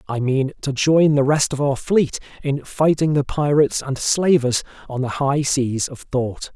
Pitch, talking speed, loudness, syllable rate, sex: 140 Hz, 190 wpm, -19 LUFS, 4.3 syllables/s, male